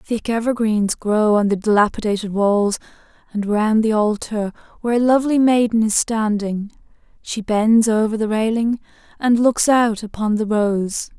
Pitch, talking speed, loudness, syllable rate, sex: 220 Hz, 150 wpm, -18 LUFS, 4.7 syllables/s, female